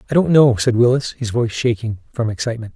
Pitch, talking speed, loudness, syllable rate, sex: 120 Hz, 215 wpm, -17 LUFS, 6.8 syllables/s, male